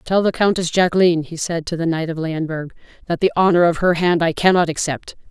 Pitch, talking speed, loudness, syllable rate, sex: 170 Hz, 225 wpm, -18 LUFS, 6.1 syllables/s, female